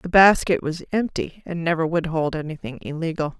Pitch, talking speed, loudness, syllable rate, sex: 165 Hz, 175 wpm, -22 LUFS, 5.3 syllables/s, female